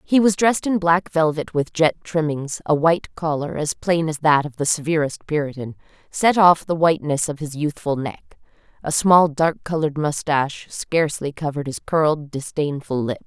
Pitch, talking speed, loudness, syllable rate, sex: 155 Hz, 175 wpm, -20 LUFS, 5.1 syllables/s, female